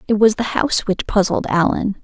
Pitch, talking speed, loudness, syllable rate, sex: 205 Hz, 205 wpm, -17 LUFS, 5.4 syllables/s, female